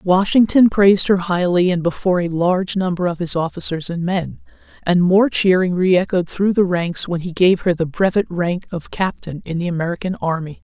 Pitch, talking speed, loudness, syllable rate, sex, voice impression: 180 Hz, 190 wpm, -17 LUFS, 5.1 syllables/s, female, very feminine, very adult-like, slightly clear, slightly calm, elegant